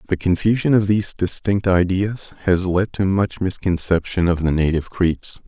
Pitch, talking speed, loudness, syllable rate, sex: 95 Hz, 165 wpm, -19 LUFS, 4.9 syllables/s, male